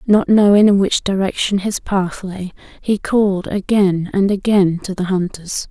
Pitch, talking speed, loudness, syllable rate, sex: 195 Hz, 170 wpm, -16 LUFS, 4.4 syllables/s, female